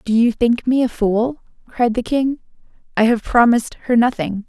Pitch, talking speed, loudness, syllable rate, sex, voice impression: 235 Hz, 190 wpm, -17 LUFS, 4.8 syllables/s, female, feminine, adult-like, sincere, slightly calm, friendly, slightly sweet